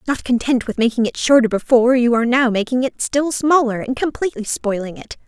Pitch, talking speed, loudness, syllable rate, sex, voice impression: 245 Hz, 205 wpm, -17 LUFS, 6.0 syllables/s, female, very feminine, slightly young, thin, slightly tensed, slightly powerful, bright, soft, slightly clear, fluent, slightly raspy, very cute, very intellectual, refreshing, sincere, very calm, very friendly, very reassuring, very unique, very elegant, slightly wild, sweet, lively, kind, slightly intense, slightly modest, light